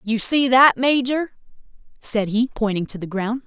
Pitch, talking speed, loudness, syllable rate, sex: 235 Hz, 175 wpm, -19 LUFS, 4.5 syllables/s, female